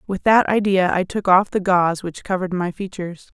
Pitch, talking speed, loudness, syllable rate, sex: 185 Hz, 215 wpm, -19 LUFS, 5.6 syllables/s, female